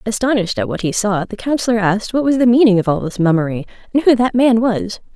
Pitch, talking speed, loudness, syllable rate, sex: 220 Hz, 245 wpm, -15 LUFS, 6.5 syllables/s, female